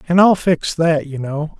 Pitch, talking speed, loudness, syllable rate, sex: 160 Hz, 225 wpm, -16 LUFS, 4.2 syllables/s, male